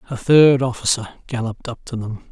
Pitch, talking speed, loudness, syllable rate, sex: 120 Hz, 180 wpm, -18 LUFS, 5.7 syllables/s, male